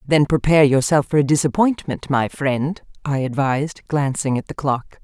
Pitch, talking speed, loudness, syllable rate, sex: 145 Hz, 165 wpm, -19 LUFS, 4.9 syllables/s, female